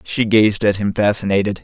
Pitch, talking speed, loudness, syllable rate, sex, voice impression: 105 Hz, 185 wpm, -16 LUFS, 5.2 syllables/s, male, masculine, adult-like, cool, slightly sincere, slightly friendly, reassuring